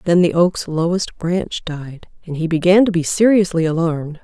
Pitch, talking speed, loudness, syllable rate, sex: 170 Hz, 185 wpm, -17 LUFS, 4.9 syllables/s, female